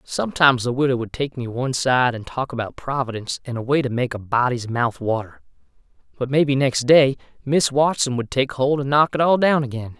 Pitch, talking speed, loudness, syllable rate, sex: 130 Hz, 215 wpm, -20 LUFS, 5.7 syllables/s, male